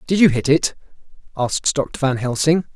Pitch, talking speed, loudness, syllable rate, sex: 145 Hz, 175 wpm, -18 LUFS, 5.1 syllables/s, male